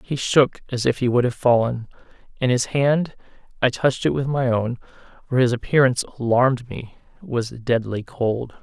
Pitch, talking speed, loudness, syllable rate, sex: 125 Hz, 160 wpm, -21 LUFS, 5.0 syllables/s, male